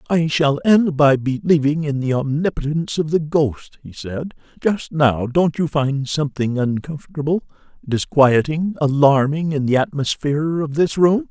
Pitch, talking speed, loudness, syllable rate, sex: 150 Hz, 150 wpm, -18 LUFS, 4.5 syllables/s, male